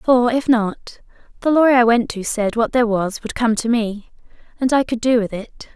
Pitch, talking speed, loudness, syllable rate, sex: 235 Hz, 220 wpm, -18 LUFS, 5.0 syllables/s, female